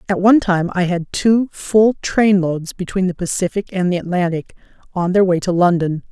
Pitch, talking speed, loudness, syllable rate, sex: 185 Hz, 185 wpm, -17 LUFS, 5.0 syllables/s, female